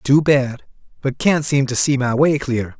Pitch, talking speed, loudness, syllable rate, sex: 135 Hz, 215 wpm, -17 LUFS, 4.2 syllables/s, male